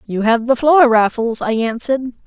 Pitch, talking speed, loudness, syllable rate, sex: 240 Hz, 185 wpm, -15 LUFS, 4.9 syllables/s, female